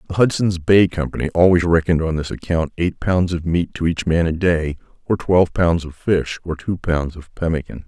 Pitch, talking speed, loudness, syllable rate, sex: 85 Hz, 215 wpm, -19 LUFS, 5.2 syllables/s, male